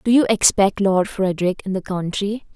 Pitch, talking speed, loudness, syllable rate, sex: 195 Hz, 190 wpm, -19 LUFS, 5.2 syllables/s, female